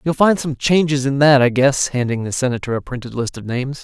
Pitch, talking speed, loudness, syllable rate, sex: 135 Hz, 250 wpm, -17 LUFS, 5.9 syllables/s, male